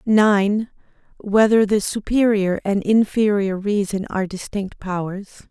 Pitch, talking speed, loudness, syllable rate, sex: 205 Hz, 110 wpm, -19 LUFS, 4.5 syllables/s, female